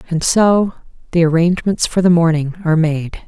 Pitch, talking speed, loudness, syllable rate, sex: 170 Hz, 165 wpm, -15 LUFS, 5.5 syllables/s, female